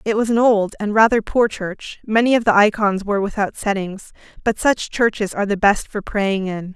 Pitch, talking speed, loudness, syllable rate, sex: 210 Hz, 215 wpm, -18 LUFS, 5.1 syllables/s, female